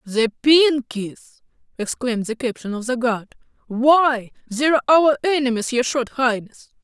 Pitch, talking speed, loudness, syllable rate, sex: 255 Hz, 130 wpm, -19 LUFS, 4.4 syllables/s, female